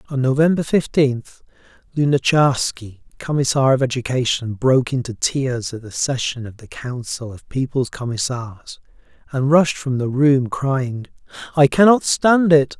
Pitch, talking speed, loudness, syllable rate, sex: 130 Hz, 135 wpm, -18 LUFS, 4.4 syllables/s, male